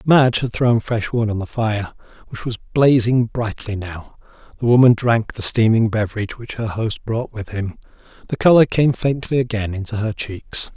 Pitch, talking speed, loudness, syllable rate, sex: 115 Hz, 185 wpm, -19 LUFS, 4.8 syllables/s, male